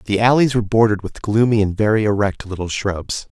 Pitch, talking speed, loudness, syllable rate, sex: 105 Hz, 195 wpm, -18 LUFS, 6.1 syllables/s, male